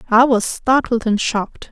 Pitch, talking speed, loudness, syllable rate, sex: 230 Hz, 175 wpm, -17 LUFS, 4.6 syllables/s, female